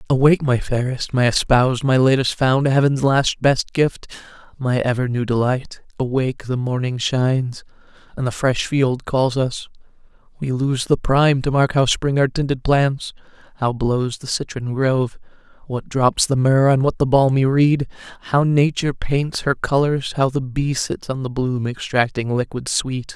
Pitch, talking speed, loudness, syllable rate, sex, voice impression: 130 Hz, 170 wpm, -19 LUFS, 4.5 syllables/s, male, masculine, very adult-like, sincere, slightly calm, friendly